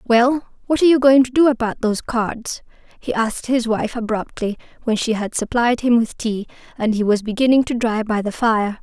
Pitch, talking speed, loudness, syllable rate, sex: 230 Hz, 210 wpm, -19 LUFS, 5.4 syllables/s, female